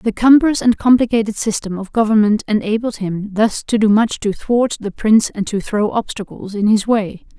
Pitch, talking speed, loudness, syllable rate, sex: 215 Hz, 195 wpm, -16 LUFS, 5.0 syllables/s, female